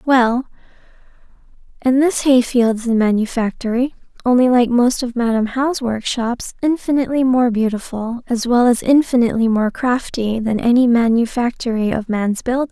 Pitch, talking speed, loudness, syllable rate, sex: 240 Hz, 140 wpm, -17 LUFS, 5.0 syllables/s, female